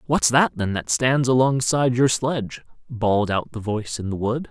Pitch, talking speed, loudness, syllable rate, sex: 120 Hz, 200 wpm, -21 LUFS, 5.2 syllables/s, male